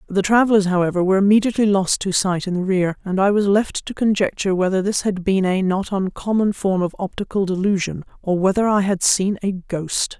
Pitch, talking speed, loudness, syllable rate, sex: 195 Hz, 205 wpm, -19 LUFS, 5.7 syllables/s, female